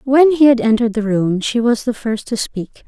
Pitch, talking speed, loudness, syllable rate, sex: 235 Hz, 250 wpm, -15 LUFS, 5.1 syllables/s, female